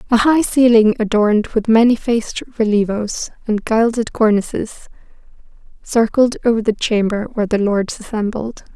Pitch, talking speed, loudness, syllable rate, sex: 220 Hz, 130 wpm, -16 LUFS, 4.9 syllables/s, female